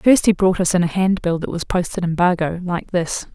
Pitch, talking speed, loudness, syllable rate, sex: 180 Hz, 250 wpm, -19 LUFS, 5.3 syllables/s, female